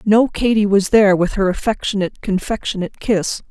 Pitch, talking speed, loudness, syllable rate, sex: 205 Hz, 155 wpm, -17 LUFS, 6.0 syllables/s, female